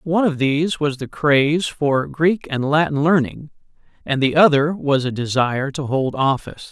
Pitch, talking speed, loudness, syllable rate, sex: 145 Hz, 180 wpm, -18 LUFS, 4.9 syllables/s, male